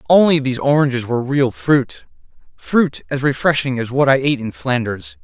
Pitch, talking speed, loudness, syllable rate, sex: 140 Hz, 170 wpm, -17 LUFS, 5.6 syllables/s, male